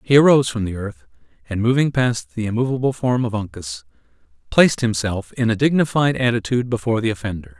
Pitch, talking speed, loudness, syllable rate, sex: 115 Hz, 175 wpm, -19 LUFS, 6.2 syllables/s, male